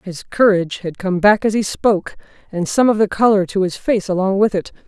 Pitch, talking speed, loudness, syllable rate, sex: 195 Hz, 235 wpm, -17 LUFS, 5.6 syllables/s, female